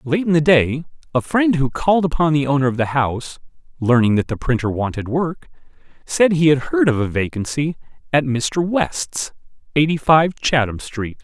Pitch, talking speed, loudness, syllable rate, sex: 145 Hz, 180 wpm, -18 LUFS, 5.0 syllables/s, male